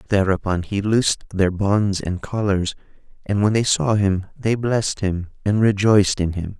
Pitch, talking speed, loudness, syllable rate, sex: 100 Hz, 175 wpm, -20 LUFS, 4.7 syllables/s, male